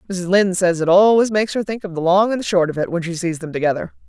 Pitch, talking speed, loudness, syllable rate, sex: 185 Hz, 295 wpm, -18 LUFS, 6.7 syllables/s, female